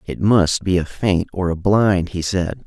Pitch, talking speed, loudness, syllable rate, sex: 90 Hz, 225 wpm, -18 LUFS, 4.0 syllables/s, male